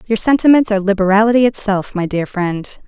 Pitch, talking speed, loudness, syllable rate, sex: 205 Hz, 165 wpm, -14 LUFS, 5.9 syllables/s, female